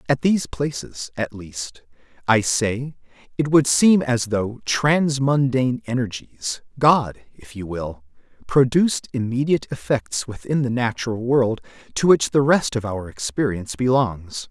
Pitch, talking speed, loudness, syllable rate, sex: 125 Hz, 135 wpm, -21 LUFS, 4.3 syllables/s, male